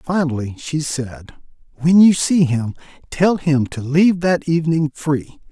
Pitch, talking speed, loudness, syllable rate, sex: 155 Hz, 150 wpm, -17 LUFS, 4.2 syllables/s, male